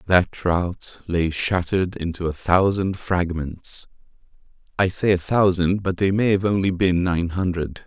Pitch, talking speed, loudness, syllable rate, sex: 90 Hz, 145 wpm, -22 LUFS, 4.1 syllables/s, male